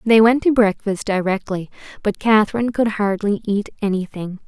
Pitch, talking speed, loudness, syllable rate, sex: 210 Hz, 145 wpm, -19 LUFS, 5.2 syllables/s, female